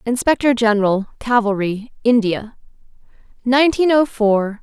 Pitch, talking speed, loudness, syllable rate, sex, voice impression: 230 Hz, 90 wpm, -17 LUFS, 4.7 syllables/s, female, very feminine, young, slightly adult-like, very thin, tensed, powerful, very bright, hard, very clear, very fluent, very cute, intellectual, very refreshing, sincere, calm, very friendly, very reassuring, very unique, elegant, slightly wild, very sweet, very lively, kind, intense, slightly sharp